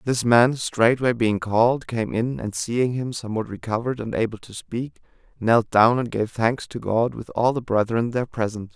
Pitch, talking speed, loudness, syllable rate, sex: 115 Hz, 200 wpm, -22 LUFS, 4.9 syllables/s, male